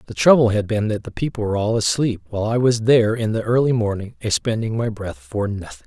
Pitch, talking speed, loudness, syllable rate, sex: 110 Hz, 235 wpm, -20 LUFS, 6.2 syllables/s, male